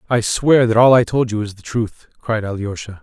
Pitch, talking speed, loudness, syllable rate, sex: 110 Hz, 240 wpm, -17 LUFS, 5.2 syllables/s, male